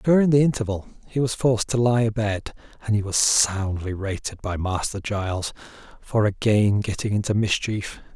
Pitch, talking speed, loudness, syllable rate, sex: 105 Hz, 160 wpm, -23 LUFS, 5.1 syllables/s, male